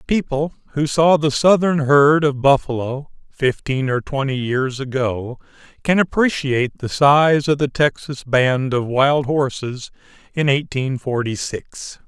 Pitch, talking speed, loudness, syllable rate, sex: 140 Hz, 140 wpm, -18 LUFS, 3.9 syllables/s, male